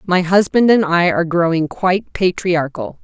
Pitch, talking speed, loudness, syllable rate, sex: 180 Hz, 160 wpm, -15 LUFS, 4.8 syllables/s, female